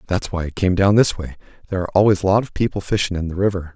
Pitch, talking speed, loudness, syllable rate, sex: 95 Hz, 290 wpm, -19 LUFS, 7.5 syllables/s, male